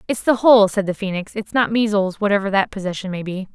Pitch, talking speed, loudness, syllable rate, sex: 205 Hz, 235 wpm, -19 LUFS, 6.0 syllables/s, female